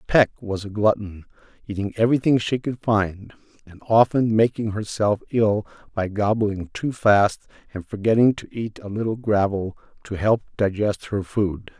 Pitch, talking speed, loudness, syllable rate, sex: 105 Hz, 155 wpm, -22 LUFS, 4.6 syllables/s, male